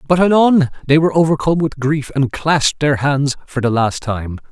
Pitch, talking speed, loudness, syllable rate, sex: 145 Hz, 200 wpm, -15 LUFS, 5.3 syllables/s, male